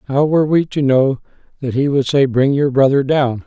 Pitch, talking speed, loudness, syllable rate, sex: 135 Hz, 225 wpm, -15 LUFS, 5.2 syllables/s, male